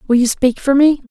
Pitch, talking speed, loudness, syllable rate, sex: 265 Hz, 270 wpm, -14 LUFS, 5.7 syllables/s, female